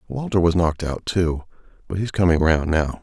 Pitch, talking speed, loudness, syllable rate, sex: 90 Hz, 220 wpm, -21 LUFS, 5.9 syllables/s, male